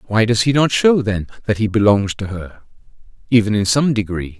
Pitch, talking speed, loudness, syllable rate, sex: 110 Hz, 205 wpm, -16 LUFS, 5.7 syllables/s, male